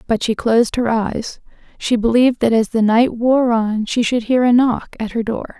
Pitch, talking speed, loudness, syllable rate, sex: 230 Hz, 225 wpm, -16 LUFS, 4.8 syllables/s, female